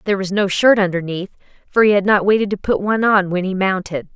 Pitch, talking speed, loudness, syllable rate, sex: 195 Hz, 245 wpm, -17 LUFS, 6.4 syllables/s, female